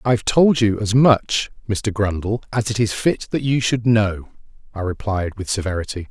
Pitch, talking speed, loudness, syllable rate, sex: 110 Hz, 185 wpm, -19 LUFS, 4.7 syllables/s, male